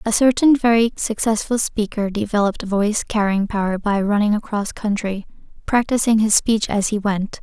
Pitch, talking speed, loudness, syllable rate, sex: 215 Hz, 155 wpm, -19 LUFS, 5.3 syllables/s, female